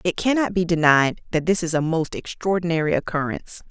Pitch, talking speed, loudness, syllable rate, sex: 170 Hz, 180 wpm, -21 LUFS, 5.8 syllables/s, female